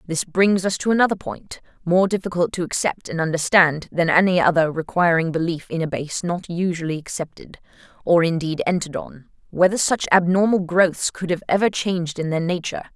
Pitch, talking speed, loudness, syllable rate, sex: 175 Hz, 170 wpm, -20 LUFS, 5.5 syllables/s, female